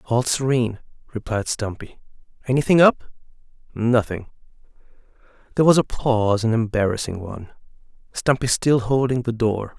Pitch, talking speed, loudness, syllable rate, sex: 120 Hz, 105 wpm, -20 LUFS, 5.3 syllables/s, male